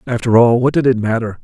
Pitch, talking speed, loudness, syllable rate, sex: 120 Hz, 250 wpm, -14 LUFS, 6.3 syllables/s, male